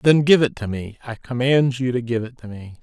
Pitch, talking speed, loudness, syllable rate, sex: 125 Hz, 275 wpm, -20 LUFS, 5.2 syllables/s, male